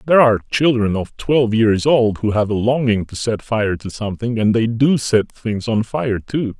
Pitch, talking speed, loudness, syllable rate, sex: 115 Hz, 220 wpm, -17 LUFS, 4.9 syllables/s, male